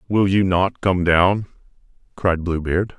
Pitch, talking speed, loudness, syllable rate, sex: 90 Hz, 160 wpm, -19 LUFS, 3.8 syllables/s, male